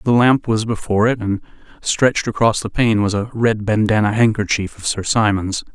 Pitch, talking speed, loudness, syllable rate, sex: 110 Hz, 190 wpm, -17 LUFS, 5.3 syllables/s, male